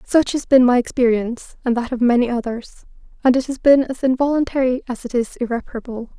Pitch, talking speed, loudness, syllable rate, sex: 250 Hz, 195 wpm, -18 LUFS, 6.0 syllables/s, female